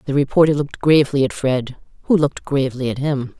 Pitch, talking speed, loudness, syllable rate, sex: 140 Hz, 195 wpm, -18 LUFS, 6.5 syllables/s, female